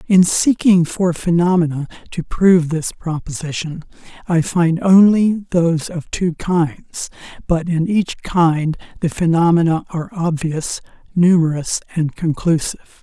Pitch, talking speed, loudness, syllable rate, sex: 170 Hz, 120 wpm, -17 LUFS, 4.3 syllables/s, male